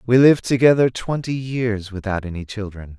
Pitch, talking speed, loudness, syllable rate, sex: 115 Hz, 160 wpm, -19 LUFS, 5.3 syllables/s, male